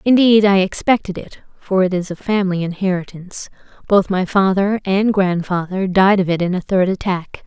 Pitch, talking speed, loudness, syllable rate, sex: 190 Hz, 175 wpm, -16 LUFS, 5.2 syllables/s, female